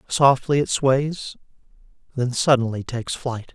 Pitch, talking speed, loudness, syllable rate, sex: 130 Hz, 120 wpm, -21 LUFS, 4.2 syllables/s, male